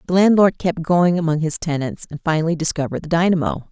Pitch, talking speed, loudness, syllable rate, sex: 165 Hz, 195 wpm, -18 LUFS, 6.4 syllables/s, female